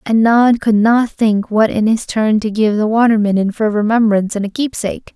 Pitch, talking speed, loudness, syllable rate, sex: 220 Hz, 235 wpm, -14 LUFS, 5.4 syllables/s, female